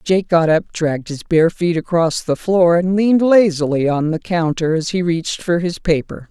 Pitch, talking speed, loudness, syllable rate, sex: 170 Hz, 210 wpm, -16 LUFS, 4.8 syllables/s, female